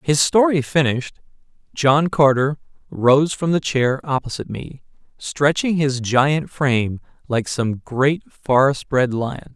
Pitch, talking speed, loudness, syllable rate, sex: 140 Hz, 130 wpm, -19 LUFS, 3.9 syllables/s, male